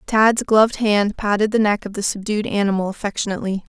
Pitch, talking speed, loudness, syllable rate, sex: 205 Hz, 175 wpm, -19 LUFS, 6.0 syllables/s, female